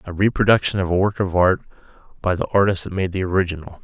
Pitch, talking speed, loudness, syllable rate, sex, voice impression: 95 Hz, 220 wpm, -20 LUFS, 6.8 syllables/s, male, masculine, slightly old, thick, cool, calm, wild